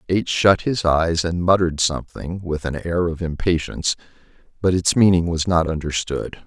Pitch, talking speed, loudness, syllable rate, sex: 85 Hz, 165 wpm, -20 LUFS, 5.1 syllables/s, male